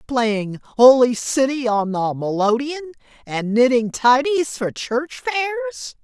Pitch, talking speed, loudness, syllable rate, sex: 260 Hz, 120 wpm, -19 LUFS, 3.5 syllables/s, female